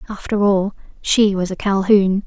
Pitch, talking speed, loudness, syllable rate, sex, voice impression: 195 Hz, 160 wpm, -17 LUFS, 4.4 syllables/s, female, very feminine, slightly young, slightly adult-like, very thin, tensed, slightly weak, very bright, hard, very clear, very fluent, very cute, intellectual, very refreshing, very sincere, calm, very friendly, very reassuring, very unique, very elegant, slightly wild, sweet, lively, very kind, slightly sharp, modest